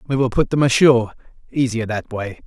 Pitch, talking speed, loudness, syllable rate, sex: 120 Hz, 195 wpm, -18 LUFS, 5.9 syllables/s, male